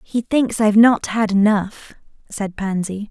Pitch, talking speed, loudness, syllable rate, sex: 210 Hz, 155 wpm, -17 LUFS, 4.1 syllables/s, female